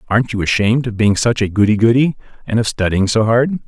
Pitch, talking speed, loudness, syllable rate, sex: 115 Hz, 230 wpm, -15 LUFS, 6.5 syllables/s, male